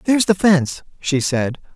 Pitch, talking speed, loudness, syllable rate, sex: 165 Hz, 170 wpm, -18 LUFS, 5.3 syllables/s, male